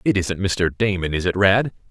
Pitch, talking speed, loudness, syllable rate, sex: 95 Hz, 220 wpm, -20 LUFS, 5.1 syllables/s, male